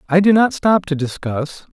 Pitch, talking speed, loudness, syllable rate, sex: 170 Hz, 205 wpm, -17 LUFS, 4.6 syllables/s, male